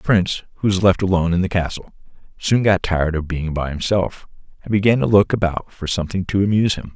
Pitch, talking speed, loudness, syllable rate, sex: 95 Hz, 225 wpm, -19 LUFS, 6.4 syllables/s, male